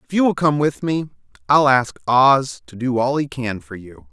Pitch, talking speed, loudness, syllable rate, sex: 130 Hz, 235 wpm, -18 LUFS, 4.6 syllables/s, male